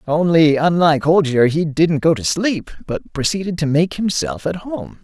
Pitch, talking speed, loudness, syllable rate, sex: 160 Hz, 180 wpm, -17 LUFS, 4.6 syllables/s, male